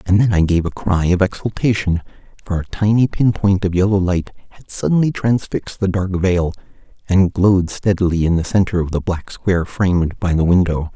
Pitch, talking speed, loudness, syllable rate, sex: 95 Hz, 190 wpm, -17 LUFS, 5.4 syllables/s, male